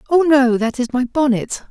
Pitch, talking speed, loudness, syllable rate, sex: 260 Hz, 210 wpm, -16 LUFS, 5.0 syllables/s, female